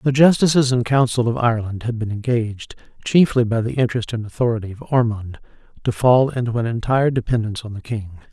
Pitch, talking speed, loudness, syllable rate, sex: 120 Hz, 190 wpm, -19 LUFS, 6.3 syllables/s, male